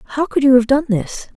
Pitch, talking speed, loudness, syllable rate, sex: 265 Hz, 255 wpm, -15 LUFS, 4.8 syllables/s, female